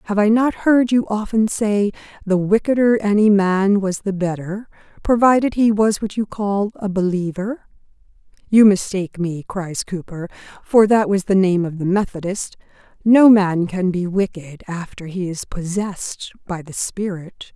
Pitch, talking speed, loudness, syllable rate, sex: 195 Hz, 160 wpm, -18 LUFS, 4.1 syllables/s, female